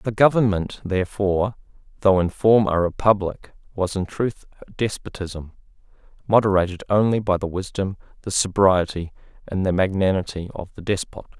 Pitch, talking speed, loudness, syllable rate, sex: 95 Hz, 135 wpm, -21 LUFS, 5.3 syllables/s, male